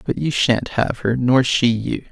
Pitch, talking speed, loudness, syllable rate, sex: 125 Hz, 225 wpm, -18 LUFS, 4.1 syllables/s, male